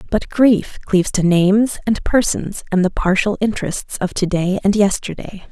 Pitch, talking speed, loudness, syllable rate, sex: 200 Hz, 175 wpm, -17 LUFS, 4.9 syllables/s, female